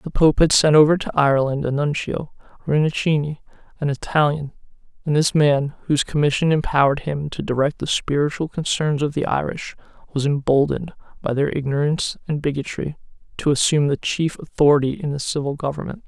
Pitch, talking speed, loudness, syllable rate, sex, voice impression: 145 Hz, 160 wpm, -20 LUFS, 5.9 syllables/s, male, masculine, adult-like, thick, relaxed, dark, muffled, intellectual, calm, slightly reassuring, slightly wild, kind, modest